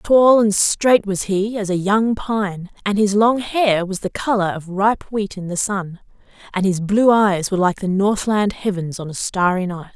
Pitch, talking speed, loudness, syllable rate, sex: 200 Hz, 210 wpm, -18 LUFS, 4.4 syllables/s, female